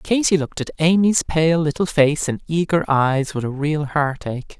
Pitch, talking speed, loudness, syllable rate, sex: 155 Hz, 185 wpm, -19 LUFS, 4.8 syllables/s, male